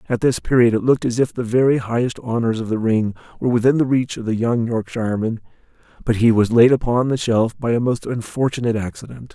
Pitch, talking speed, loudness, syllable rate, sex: 115 Hz, 220 wpm, -19 LUFS, 6.2 syllables/s, male